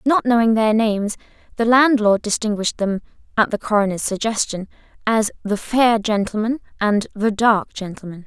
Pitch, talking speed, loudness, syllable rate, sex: 215 Hz, 145 wpm, -19 LUFS, 5.1 syllables/s, female